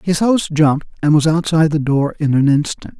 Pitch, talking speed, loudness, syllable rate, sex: 155 Hz, 220 wpm, -15 LUFS, 5.4 syllables/s, male